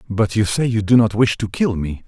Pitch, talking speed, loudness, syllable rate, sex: 110 Hz, 290 wpm, -18 LUFS, 5.4 syllables/s, male